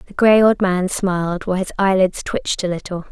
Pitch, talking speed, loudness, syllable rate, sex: 190 Hz, 210 wpm, -18 LUFS, 5.7 syllables/s, female